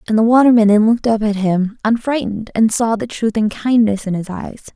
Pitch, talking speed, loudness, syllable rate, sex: 220 Hz, 225 wpm, -15 LUFS, 5.7 syllables/s, female